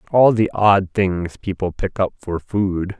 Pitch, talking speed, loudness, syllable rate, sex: 95 Hz, 180 wpm, -19 LUFS, 3.8 syllables/s, male